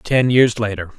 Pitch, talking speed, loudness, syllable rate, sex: 110 Hz, 185 wpm, -16 LUFS, 4.6 syllables/s, male